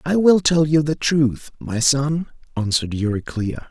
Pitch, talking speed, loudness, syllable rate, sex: 140 Hz, 160 wpm, -19 LUFS, 4.4 syllables/s, male